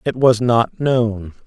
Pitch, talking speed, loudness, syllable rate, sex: 120 Hz, 165 wpm, -17 LUFS, 3.1 syllables/s, male